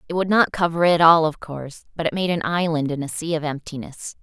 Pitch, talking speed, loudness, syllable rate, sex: 160 Hz, 255 wpm, -20 LUFS, 5.9 syllables/s, female